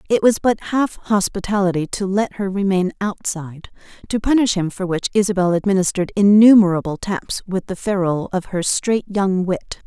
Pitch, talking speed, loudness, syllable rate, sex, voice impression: 195 Hz, 165 wpm, -18 LUFS, 5.2 syllables/s, female, very feminine, middle-aged, thin, tensed, slightly powerful, bright, slightly soft, clear, fluent, cool, intellectual, refreshing, sincere, slightly calm, slightly friendly, reassuring, unique, slightly elegant, slightly wild, sweet, lively, strict, slightly intense, sharp, slightly light